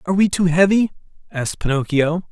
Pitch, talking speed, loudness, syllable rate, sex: 170 Hz, 155 wpm, -18 LUFS, 6.3 syllables/s, male